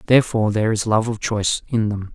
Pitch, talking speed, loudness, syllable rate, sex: 110 Hz, 225 wpm, -20 LUFS, 6.7 syllables/s, male